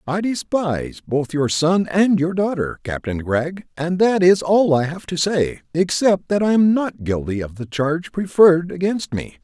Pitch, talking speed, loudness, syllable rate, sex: 170 Hz, 190 wpm, -19 LUFS, 4.5 syllables/s, male